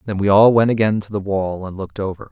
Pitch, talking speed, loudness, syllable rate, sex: 100 Hz, 285 wpm, -17 LUFS, 6.5 syllables/s, male